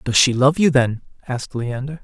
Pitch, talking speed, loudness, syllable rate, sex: 130 Hz, 205 wpm, -18 LUFS, 5.4 syllables/s, male